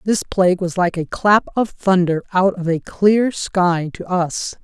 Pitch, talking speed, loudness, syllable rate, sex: 185 Hz, 195 wpm, -18 LUFS, 4.0 syllables/s, female